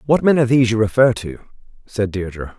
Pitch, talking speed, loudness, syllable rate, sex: 115 Hz, 210 wpm, -17 LUFS, 6.5 syllables/s, male